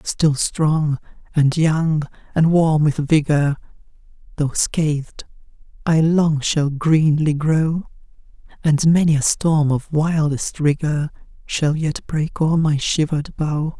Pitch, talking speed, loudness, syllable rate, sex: 155 Hz, 125 wpm, -19 LUFS, 3.6 syllables/s, female